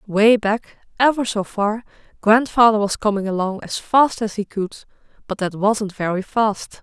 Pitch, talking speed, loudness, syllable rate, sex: 215 Hz, 165 wpm, -19 LUFS, 4.3 syllables/s, female